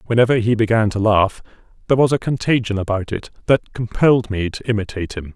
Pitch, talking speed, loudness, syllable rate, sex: 110 Hz, 190 wpm, -18 LUFS, 6.4 syllables/s, male